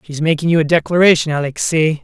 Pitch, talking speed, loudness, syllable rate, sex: 160 Hz, 205 wpm, -15 LUFS, 6.9 syllables/s, male